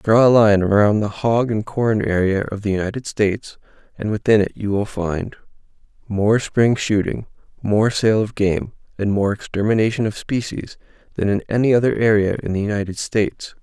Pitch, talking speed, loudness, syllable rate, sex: 105 Hz, 175 wpm, -19 LUFS, 5.1 syllables/s, male